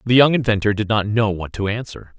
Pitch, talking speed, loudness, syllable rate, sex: 105 Hz, 245 wpm, -19 LUFS, 5.8 syllables/s, male